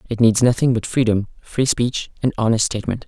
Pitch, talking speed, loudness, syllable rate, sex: 115 Hz, 195 wpm, -19 LUFS, 5.8 syllables/s, male